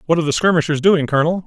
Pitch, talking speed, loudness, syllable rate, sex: 160 Hz, 245 wpm, -16 LUFS, 8.3 syllables/s, male